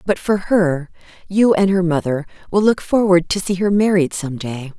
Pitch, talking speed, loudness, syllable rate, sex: 180 Hz, 190 wpm, -17 LUFS, 4.8 syllables/s, female